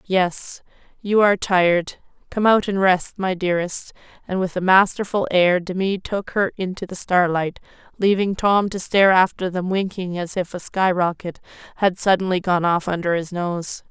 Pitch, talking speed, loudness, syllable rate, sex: 185 Hz, 175 wpm, -20 LUFS, 4.8 syllables/s, female